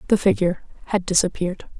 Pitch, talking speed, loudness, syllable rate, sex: 185 Hz, 135 wpm, -21 LUFS, 6.9 syllables/s, female